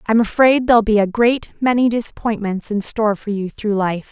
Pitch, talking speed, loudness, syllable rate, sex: 220 Hz, 205 wpm, -17 LUFS, 5.4 syllables/s, female